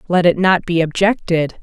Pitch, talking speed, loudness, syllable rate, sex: 180 Hz, 185 wpm, -15 LUFS, 4.8 syllables/s, female